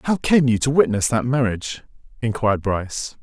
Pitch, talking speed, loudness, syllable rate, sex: 120 Hz, 170 wpm, -20 LUFS, 5.8 syllables/s, male